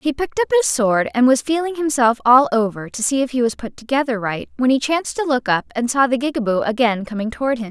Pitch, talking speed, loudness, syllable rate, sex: 255 Hz, 255 wpm, -18 LUFS, 6.1 syllables/s, female